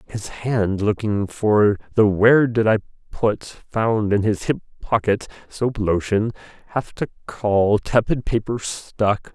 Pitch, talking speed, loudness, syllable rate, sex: 105 Hz, 140 wpm, -20 LUFS, 3.7 syllables/s, male